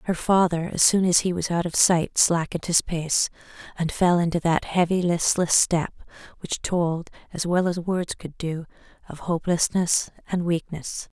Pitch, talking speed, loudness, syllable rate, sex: 170 Hz, 170 wpm, -23 LUFS, 4.6 syllables/s, female